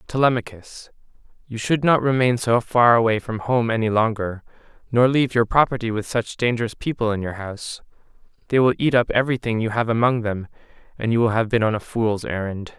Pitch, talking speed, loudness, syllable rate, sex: 115 Hz, 190 wpm, -21 LUFS, 5.8 syllables/s, male